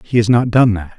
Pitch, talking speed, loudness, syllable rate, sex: 110 Hz, 305 wpm, -14 LUFS, 5.6 syllables/s, male